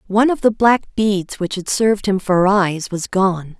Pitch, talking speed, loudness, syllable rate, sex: 200 Hz, 215 wpm, -17 LUFS, 4.6 syllables/s, female